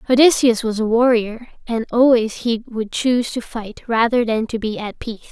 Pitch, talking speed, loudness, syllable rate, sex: 230 Hz, 190 wpm, -18 LUFS, 5.2 syllables/s, female